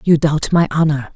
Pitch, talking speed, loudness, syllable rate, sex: 150 Hz, 205 wpm, -15 LUFS, 5.0 syllables/s, female